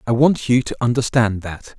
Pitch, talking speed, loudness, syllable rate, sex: 120 Hz, 200 wpm, -18 LUFS, 5.0 syllables/s, male